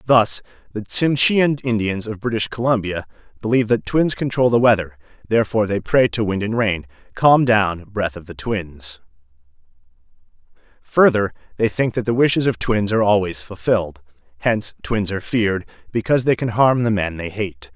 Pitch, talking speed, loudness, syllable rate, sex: 105 Hz, 165 wpm, -19 LUFS, 5.3 syllables/s, male